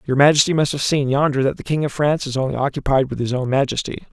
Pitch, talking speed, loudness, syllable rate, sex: 140 Hz, 260 wpm, -19 LUFS, 6.8 syllables/s, male